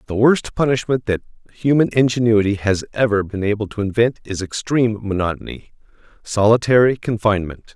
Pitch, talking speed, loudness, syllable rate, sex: 110 Hz, 125 wpm, -18 LUFS, 5.6 syllables/s, male